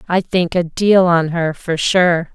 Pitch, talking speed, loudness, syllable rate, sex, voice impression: 175 Hz, 205 wpm, -15 LUFS, 3.7 syllables/s, female, feminine, adult-like, tensed, slightly bright, soft, slightly muffled, slightly halting, calm, slightly friendly, unique, slightly kind, modest